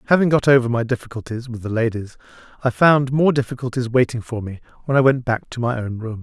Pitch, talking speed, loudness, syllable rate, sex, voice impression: 125 Hz, 220 wpm, -19 LUFS, 6.2 syllables/s, male, masculine, adult-like, slightly relaxed, slightly bright, soft, cool, slightly mature, friendly, wild, lively, slightly strict